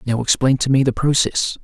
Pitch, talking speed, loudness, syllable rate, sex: 130 Hz, 220 wpm, -17 LUFS, 5.3 syllables/s, male